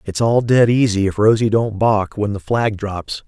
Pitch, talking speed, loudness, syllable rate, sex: 105 Hz, 220 wpm, -17 LUFS, 4.4 syllables/s, male